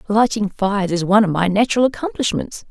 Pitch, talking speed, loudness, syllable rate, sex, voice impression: 210 Hz, 175 wpm, -18 LUFS, 6.4 syllables/s, female, feminine, slightly young, soft, fluent, slightly raspy, cute, refreshing, calm, elegant, kind, modest